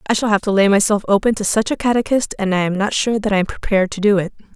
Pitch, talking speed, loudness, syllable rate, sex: 205 Hz, 305 wpm, -17 LUFS, 6.9 syllables/s, female